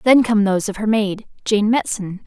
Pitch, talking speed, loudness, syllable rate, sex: 210 Hz, 210 wpm, -18 LUFS, 5.2 syllables/s, female